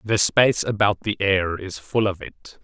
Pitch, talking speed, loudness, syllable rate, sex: 100 Hz, 205 wpm, -21 LUFS, 4.4 syllables/s, male